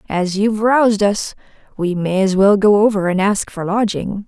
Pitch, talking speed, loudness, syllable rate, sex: 200 Hz, 195 wpm, -16 LUFS, 4.9 syllables/s, female